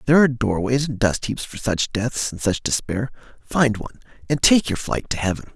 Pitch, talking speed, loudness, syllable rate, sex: 115 Hz, 205 wpm, -21 LUFS, 5.4 syllables/s, male